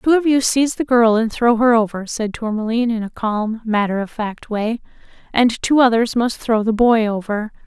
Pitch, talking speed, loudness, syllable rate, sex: 230 Hz, 210 wpm, -17 LUFS, 5.1 syllables/s, female